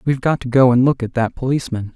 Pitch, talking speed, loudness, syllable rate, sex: 125 Hz, 275 wpm, -17 LUFS, 7.1 syllables/s, male